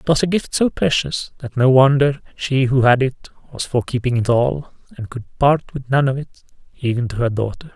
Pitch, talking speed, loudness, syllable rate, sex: 130 Hz, 215 wpm, -18 LUFS, 5.0 syllables/s, male